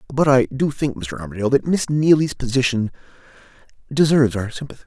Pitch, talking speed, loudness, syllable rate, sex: 130 Hz, 160 wpm, -19 LUFS, 6.2 syllables/s, male